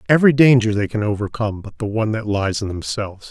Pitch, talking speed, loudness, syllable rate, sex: 110 Hz, 220 wpm, -18 LUFS, 6.7 syllables/s, male